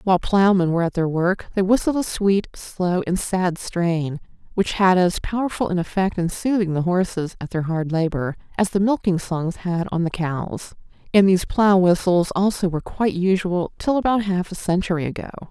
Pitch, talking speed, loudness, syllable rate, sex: 185 Hz, 195 wpm, -21 LUFS, 5.1 syllables/s, female